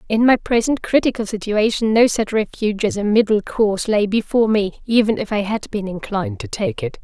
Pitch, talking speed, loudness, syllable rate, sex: 215 Hz, 195 wpm, -18 LUFS, 5.7 syllables/s, female